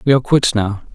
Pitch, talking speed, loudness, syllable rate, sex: 120 Hz, 255 wpm, -16 LUFS, 6.7 syllables/s, male